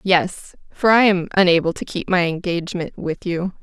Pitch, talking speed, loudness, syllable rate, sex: 180 Hz, 180 wpm, -19 LUFS, 4.9 syllables/s, female